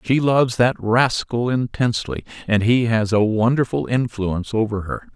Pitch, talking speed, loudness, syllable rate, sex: 115 Hz, 150 wpm, -19 LUFS, 4.8 syllables/s, male